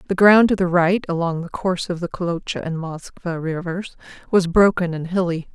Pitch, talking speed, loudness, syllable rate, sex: 175 Hz, 175 wpm, -20 LUFS, 5.2 syllables/s, female